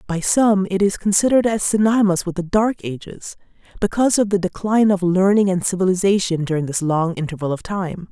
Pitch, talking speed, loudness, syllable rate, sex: 190 Hz, 185 wpm, -18 LUFS, 5.9 syllables/s, female